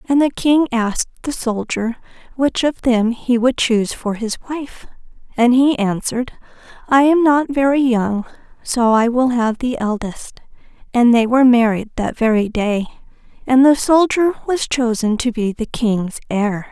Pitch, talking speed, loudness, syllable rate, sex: 240 Hz, 160 wpm, -16 LUFS, 4.5 syllables/s, female